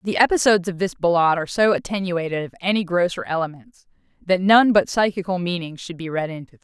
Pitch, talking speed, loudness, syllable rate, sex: 180 Hz, 200 wpm, -20 LUFS, 6.4 syllables/s, female